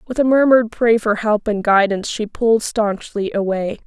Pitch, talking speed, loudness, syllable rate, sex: 220 Hz, 185 wpm, -17 LUFS, 5.2 syllables/s, female